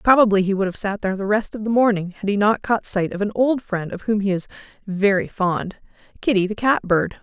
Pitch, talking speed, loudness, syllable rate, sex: 205 Hz, 240 wpm, -20 LUFS, 5.8 syllables/s, female